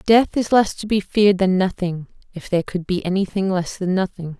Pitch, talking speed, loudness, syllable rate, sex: 190 Hz, 220 wpm, -20 LUFS, 5.4 syllables/s, female